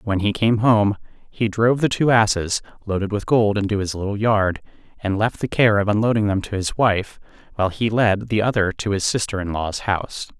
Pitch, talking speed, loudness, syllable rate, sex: 105 Hz, 215 wpm, -20 LUFS, 5.4 syllables/s, male